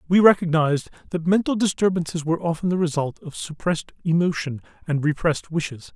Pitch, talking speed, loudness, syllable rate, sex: 165 Hz, 150 wpm, -22 LUFS, 6.3 syllables/s, male